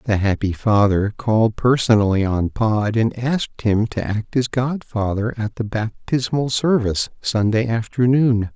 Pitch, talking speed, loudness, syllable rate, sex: 110 Hz, 140 wpm, -19 LUFS, 4.4 syllables/s, male